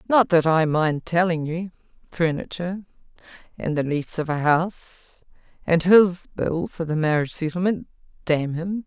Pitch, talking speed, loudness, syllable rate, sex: 170 Hz, 135 wpm, -22 LUFS, 4.8 syllables/s, female